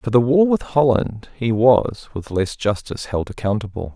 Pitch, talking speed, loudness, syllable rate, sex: 115 Hz, 180 wpm, -19 LUFS, 4.7 syllables/s, male